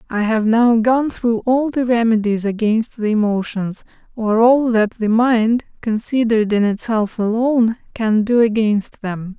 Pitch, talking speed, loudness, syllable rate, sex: 225 Hz, 155 wpm, -17 LUFS, 4.2 syllables/s, female